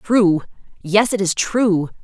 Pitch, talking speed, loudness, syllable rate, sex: 195 Hz, 150 wpm, -17 LUFS, 3.5 syllables/s, female